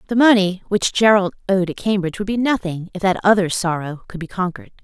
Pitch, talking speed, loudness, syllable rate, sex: 190 Hz, 210 wpm, -18 LUFS, 6.1 syllables/s, female